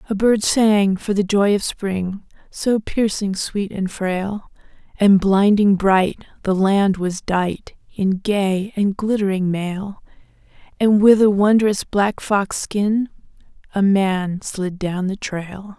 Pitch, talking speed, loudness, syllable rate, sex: 200 Hz, 145 wpm, -19 LUFS, 3.3 syllables/s, female